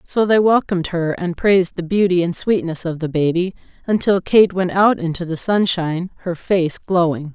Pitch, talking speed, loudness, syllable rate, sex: 180 Hz, 190 wpm, -18 LUFS, 5.0 syllables/s, female